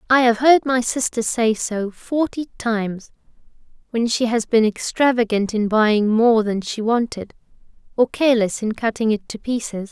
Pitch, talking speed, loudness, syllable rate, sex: 230 Hz, 165 wpm, -19 LUFS, 4.6 syllables/s, female